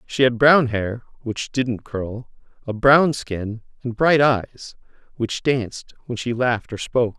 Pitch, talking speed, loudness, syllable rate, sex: 120 Hz, 165 wpm, -20 LUFS, 4.0 syllables/s, male